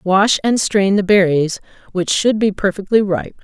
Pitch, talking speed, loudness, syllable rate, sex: 195 Hz, 175 wpm, -15 LUFS, 4.3 syllables/s, female